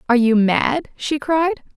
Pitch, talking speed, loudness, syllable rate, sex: 275 Hz, 170 wpm, -18 LUFS, 4.2 syllables/s, female